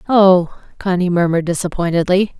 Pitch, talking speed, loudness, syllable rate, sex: 180 Hz, 100 wpm, -16 LUFS, 5.5 syllables/s, female